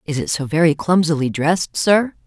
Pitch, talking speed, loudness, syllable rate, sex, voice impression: 160 Hz, 185 wpm, -17 LUFS, 5.3 syllables/s, female, feminine, middle-aged, tensed, powerful, slightly hard, clear, fluent, intellectual, elegant, lively, strict, sharp